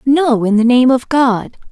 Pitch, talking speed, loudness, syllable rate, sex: 250 Hz, 210 wpm, -12 LUFS, 4.0 syllables/s, female